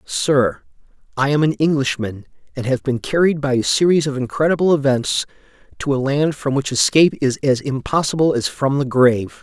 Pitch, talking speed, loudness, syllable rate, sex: 140 Hz, 170 wpm, -18 LUFS, 5.3 syllables/s, male